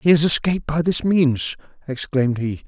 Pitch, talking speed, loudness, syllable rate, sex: 150 Hz, 180 wpm, -19 LUFS, 5.2 syllables/s, male